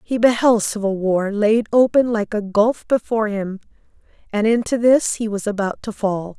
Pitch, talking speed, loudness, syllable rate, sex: 215 Hz, 180 wpm, -19 LUFS, 4.7 syllables/s, female